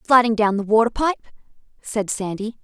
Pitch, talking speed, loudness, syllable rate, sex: 220 Hz, 160 wpm, -20 LUFS, 5.3 syllables/s, female